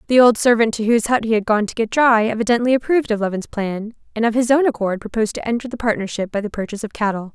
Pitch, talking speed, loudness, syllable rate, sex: 225 Hz, 260 wpm, -18 LUFS, 7.1 syllables/s, female